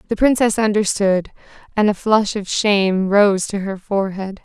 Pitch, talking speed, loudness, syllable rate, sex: 200 Hz, 160 wpm, -17 LUFS, 4.7 syllables/s, female